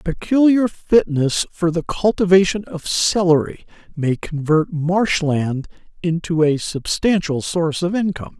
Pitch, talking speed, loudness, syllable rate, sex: 170 Hz, 120 wpm, -18 LUFS, 4.2 syllables/s, male